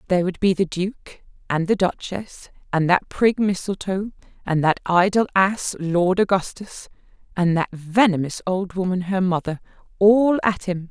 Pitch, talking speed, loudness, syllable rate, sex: 185 Hz, 155 wpm, -21 LUFS, 4.4 syllables/s, female